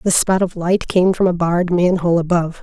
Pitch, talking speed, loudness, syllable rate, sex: 175 Hz, 250 wpm, -16 LUFS, 5.5 syllables/s, female